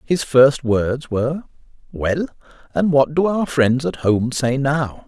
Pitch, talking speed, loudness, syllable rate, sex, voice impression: 140 Hz, 165 wpm, -18 LUFS, 3.7 syllables/s, male, masculine, adult-like, thick, tensed, powerful, slightly muffled, slightly raspy, intellectual, friendly, unique, wild, lively